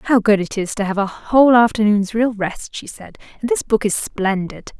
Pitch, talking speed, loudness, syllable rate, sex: 215 Hz, 225 wpm, -17 LUFS, 4.9 syllables/s, female